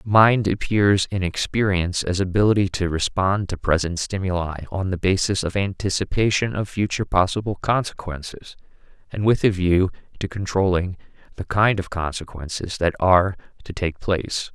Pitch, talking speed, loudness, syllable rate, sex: 95 Hz, 145 wpm, -22 LUFS, 5.1 syllables/s, male